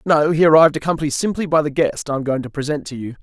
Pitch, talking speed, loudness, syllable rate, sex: 150 Hz, 280 wpm, -17 LUFS, 7.2 syllables/s, male